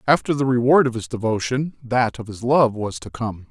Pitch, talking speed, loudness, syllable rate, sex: 125 Hz, 225 wpm, -20 LUFS, 5.2 syllables/s, male